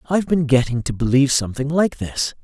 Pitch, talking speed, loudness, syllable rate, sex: 140 Hz, 195 wpm, -19 LUFS, 6.3 syllables/s, male